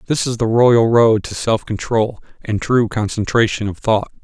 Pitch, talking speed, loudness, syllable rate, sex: 115 Hz, 185 wpm, -16 LUFS, 4.5 syllables/s, male